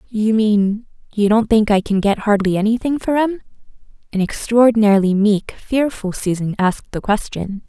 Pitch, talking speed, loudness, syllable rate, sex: 215 Hz, 150 wpm, -17 LUFS, 5.0 syllables/s, female